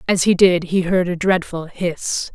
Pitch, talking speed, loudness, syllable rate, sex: 175 Hz, 205 wpm, -18 LUFS, 4.1 syllables/s, female